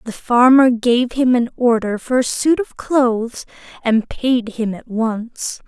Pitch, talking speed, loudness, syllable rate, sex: 240 Hz, 170 wpm, -17 LUFS, 3.7 syllables/s, female